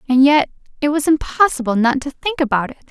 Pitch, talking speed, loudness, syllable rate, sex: 280 Hz, 205 wpm, -17 LUFS, 6.1 syllables/s, female